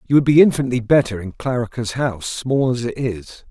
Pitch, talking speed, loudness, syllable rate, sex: 125 Hz, 205 wpm, -18 LUFS, 6.0 syllables/s, male